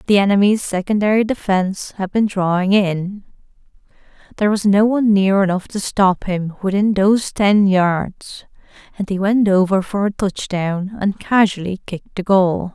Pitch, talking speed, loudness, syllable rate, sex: 195 Hz, 155 wpm, -17 LUFS, 4.8 syllables/s, female